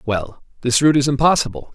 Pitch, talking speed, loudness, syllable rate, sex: 125 Hz, 170 wpm, -17 LUFS, 6.2 syllables/s, male